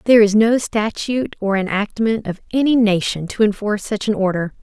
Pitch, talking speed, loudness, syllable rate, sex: 210 Hz, 180 wpm, -18 LUFS, 5.6 syllables/s, female